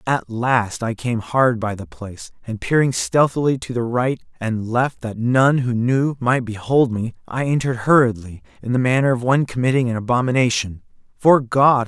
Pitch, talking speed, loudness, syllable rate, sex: 120 Hz, 180 wpm, -19 LUFS, 4.9 syllables/s, male